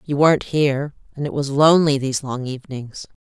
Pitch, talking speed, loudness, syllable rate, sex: 140 Hz, 185 wpm, -19 LUFS, 6.1 syllables/s, female